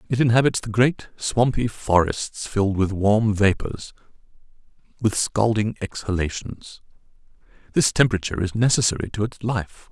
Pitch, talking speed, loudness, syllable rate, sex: 110 Hz, 120 wpm, -22 LUFS, 4.9 syllables/s, male